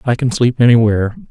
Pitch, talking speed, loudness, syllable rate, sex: 120 Hz, 185 wpm, -13 LUFS, 6.5 syllables/s, male